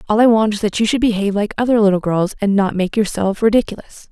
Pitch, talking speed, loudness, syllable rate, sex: 210 Hz, 250 wpm, -16 LUFS, 6.5 syllables/s, female